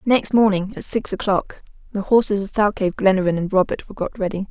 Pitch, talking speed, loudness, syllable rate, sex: 200 Hz, 200 wpm, -20 LUFS, 6.2 syllables/s, female